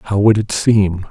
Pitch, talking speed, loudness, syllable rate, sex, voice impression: 100 Hz, 220 wpm, -14 LUFS, 3.8 syllables/s, male, very masculine, old, very thick, slightly tensed, very powerful, very dark, soft, very muffled, halting, raspy, very cool, intellectual, slightly refreshing, sincere, very calm, very mature, friendly, reassuring, very unique, slightly elegant, very wild, sweet, slightly lively, very kind, very modest